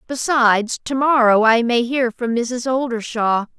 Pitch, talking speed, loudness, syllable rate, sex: 240 Hz, 150 wpm, -17 LUFS, 4.2 syllables/s, female